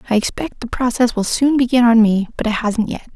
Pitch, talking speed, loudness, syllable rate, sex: 235 Hz, 245 wpm, -16 LUFS, 5.8 syllables/s, female